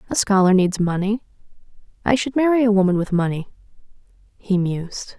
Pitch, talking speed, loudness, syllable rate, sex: 205 Hz, 150 wpm, -19 LUFS, 5.8 syllables/s, female